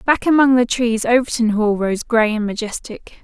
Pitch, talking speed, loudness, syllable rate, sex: 230 Hz, 185 wpm, -17 LUFS, 4.8 syllables/s, female